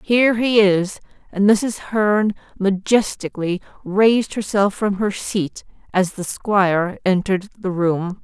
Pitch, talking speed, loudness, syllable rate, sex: 200 Hz, 130 wpm, -19 LUFS, 4.1 syllables/s, female